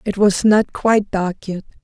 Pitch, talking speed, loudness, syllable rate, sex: 200 Hz, 195 wpm, -17 LUFS, 4.5 syllables/s, female